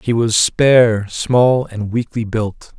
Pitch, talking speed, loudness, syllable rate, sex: 115 Hz, 150 wpm, -15 LUFS, 3.3 syllables/s, male